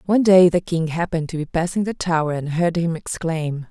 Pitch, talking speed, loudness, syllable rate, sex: 170 Hz, 225 wpm, -20 LUFS, 5.6 syllables/s, female